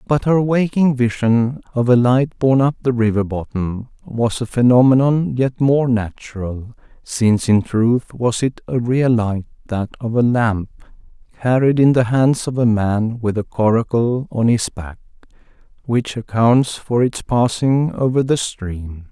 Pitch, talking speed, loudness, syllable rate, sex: 120 Hz, 160 wpm, -17 LUFS, 4.1 syllables/s, male